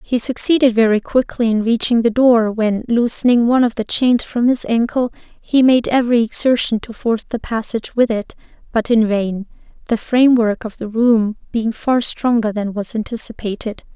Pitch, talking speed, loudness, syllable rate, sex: 230 Hz, 175 wpm, -16 LUFS, 5.1 syllables/s, female